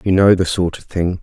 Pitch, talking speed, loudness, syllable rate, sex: 90 Hz, 295 wpm, -16 LUFS, 5.3 syllables/s, male